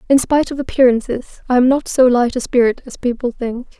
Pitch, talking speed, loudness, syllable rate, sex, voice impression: 250 Hz, 220 wpm, -16 LUFS, 5.9 syllables/s, female, very feminine, young, very thin, relaxed, weak, slightly dark, very soft, very clear, muffled, fluent, slightly raspy, very cute, intellectual, refreshing, very sincere, very calm, very friendly, very reassuring, very unique, very elegant, very sweet, slightly lively, very kind, very modest, very light